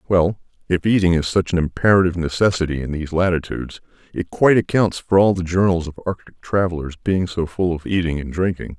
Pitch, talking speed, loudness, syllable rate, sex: 85 Hz, 190 wpm, -19 LUFS, 6.0 syllables/s, male